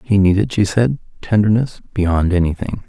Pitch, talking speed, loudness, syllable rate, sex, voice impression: 100 Hz, 145 wpm, -17 LUFS, 4.9 syllables/s, male, masculine, adult-like, relaxed, weak, dark, muffled, slightly sincere, calm, mature, slightly friendly, reassuring, wild, kind